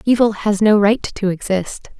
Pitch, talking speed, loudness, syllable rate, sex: 205 Hz, 180 wpm, -16 LUFS, 4.4 syllables/s, female